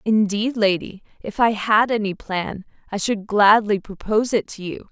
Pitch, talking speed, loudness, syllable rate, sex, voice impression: 210 Hz, 170 wpm, -20 LUFS, 4.6 syllables/s, female, feminine, slightly adult-like, clear, slightly intellectual, friendly, slightly kind